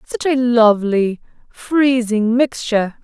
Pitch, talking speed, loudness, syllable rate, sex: 240 Hz, 100 wpm, -16 LUFS, 3.8 syllables/s, female